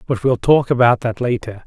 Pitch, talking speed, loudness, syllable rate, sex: 120 Hz, 215 wpm, -16 LUFS, 5.2 syllables/s, male